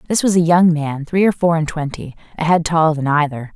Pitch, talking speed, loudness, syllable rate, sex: 160 Hz, 255 wpm, -16 LUFS, 5.8 syllables/s, female